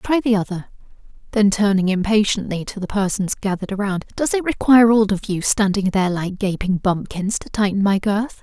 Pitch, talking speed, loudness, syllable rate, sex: 200 Hz, 185 wpm, -19 LUFS, 5.5 syllables/s, female